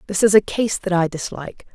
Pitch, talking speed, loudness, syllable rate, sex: 185 Hz, 240 wpm, -19 LUFS, 6.0 syllables/s, female